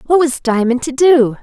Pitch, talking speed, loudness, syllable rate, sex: 270 Hz, 210 wpm, -13 LUFS, 4.8 syllables/s, female